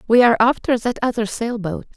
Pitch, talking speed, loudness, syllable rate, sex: 230 Hz, 215 wpm, -19 LUFS, 6.1 syllables/s, female